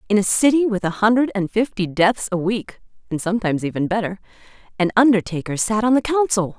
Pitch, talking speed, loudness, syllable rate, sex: 205 Hz, 190 wpm, -19 LUFS, 6.0 syllables/s, female